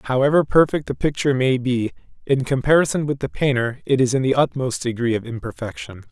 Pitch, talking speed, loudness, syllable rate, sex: 130 Hz, 185 wpm, -20 LUFS, 5.9 syllables/s, male